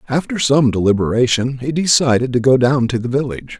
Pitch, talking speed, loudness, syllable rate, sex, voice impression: 130 Hz, 185 wpm, -16 LUFS, 5.9 syllables/s, male, masculine, middle-aged, slightly thick, cool, sincere, slightly friendly, slightly kind